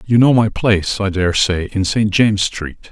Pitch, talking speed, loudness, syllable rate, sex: 100 Hz, 225 wpm, -15 LUFS, 4.8 syllables/s, male